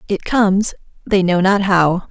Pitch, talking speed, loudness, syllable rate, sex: 190 Hz, 170 wpm, -16 LUFS, 4.4 syllables/s, female